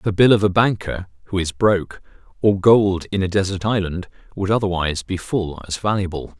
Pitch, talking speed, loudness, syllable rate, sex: 95 Hz, 190 wpm, -19 LUFS, 5.4 syllables/s, male